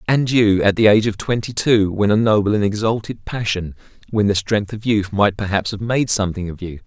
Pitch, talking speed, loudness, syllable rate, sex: 105 Hz, 225 wpm, -18 LUFS, 5.6 syllables/s, male